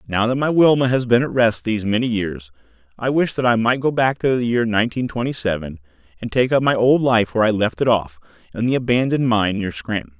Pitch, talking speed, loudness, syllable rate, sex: 115 Hz, 240 wpm, -18 LUFS, 6.0 syllables/s, male